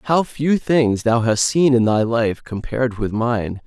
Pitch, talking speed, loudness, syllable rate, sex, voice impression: 120 Hz, 195 wpm, -18 LUFS, 3.9 syllables/s, male, masculine, adult-like, thick, tensed, slightly powerful, bright, clear, slightly nasal, cool, intellectual, calm, friendly, wild, lively, kind